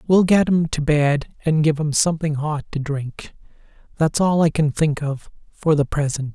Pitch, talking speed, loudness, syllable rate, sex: 155 Hz, 190 wpm, -20 LUFS, 4.6 syllables/s, male